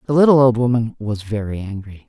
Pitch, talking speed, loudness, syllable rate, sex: 120 Hz, 200 wpm, -17 LUFS, 5.9 syllables/s, female